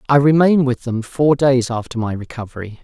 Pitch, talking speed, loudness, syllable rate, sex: 130 Hz, 190 wpm, -16 LUFS, 5.7 syllables/s, male